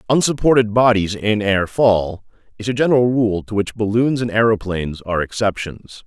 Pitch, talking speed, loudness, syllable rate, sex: 110 Hz, 160 wpm, -17 LUFS, 5.2 syllables/s, male